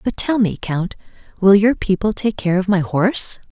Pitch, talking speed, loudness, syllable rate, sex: 200 Hz, 205 wpm, -17 LUFS, 4.9 syllables/s, female